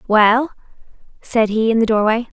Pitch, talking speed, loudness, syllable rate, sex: 225 Hz, 150 wpm, -16 LUFS, 4.6 syllables/s, female